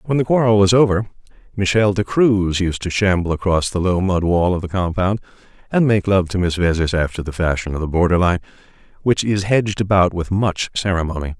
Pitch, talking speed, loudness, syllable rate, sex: 95 Hz, 195 wpm, -18 LUFS, 5.8 syllables/s, male